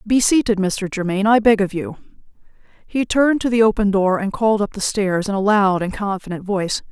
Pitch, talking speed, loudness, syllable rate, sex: 205 Hz, 215 wpm, -18 LUFS, 5.8 syllables/s, female